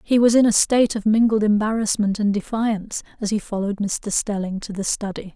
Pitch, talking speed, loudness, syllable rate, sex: 210 Hz, 200 wpm, -20 LUFS, 5.7 syllables/s, female